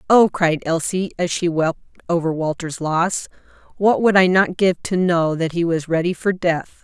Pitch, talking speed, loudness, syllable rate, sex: 170 Hz, 195 wpm, -19 LUFS, 4.6 syllables/s, female